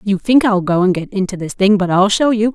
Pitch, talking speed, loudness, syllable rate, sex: 200 Hz, 305 wpm, -14 LUFS, 5.7 syllables/s, female